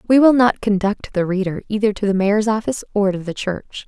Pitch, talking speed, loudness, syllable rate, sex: 205 Hz, 230 wpm, -18 LUFS, 5.7 syllables/s, female